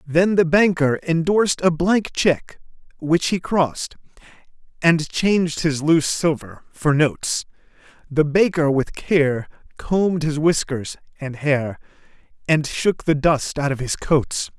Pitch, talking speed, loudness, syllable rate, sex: 155 Hz, 140 wpm, -20 LUFS, 4.0 syllables/s, male